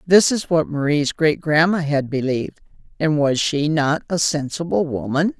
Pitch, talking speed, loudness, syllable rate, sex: 155 Hz, 165 wpm, -19 LUFS, 4.6 syllables/s, female